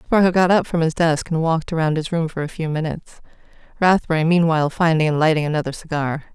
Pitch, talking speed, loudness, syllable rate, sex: 160 Hz, 210 wpm, -19 LUFS, 6.6 syllables/s, female